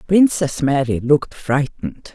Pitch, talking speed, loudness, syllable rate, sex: 145 Hz, 110 wpm, -18 LUFS, 4.5 syllables/s, female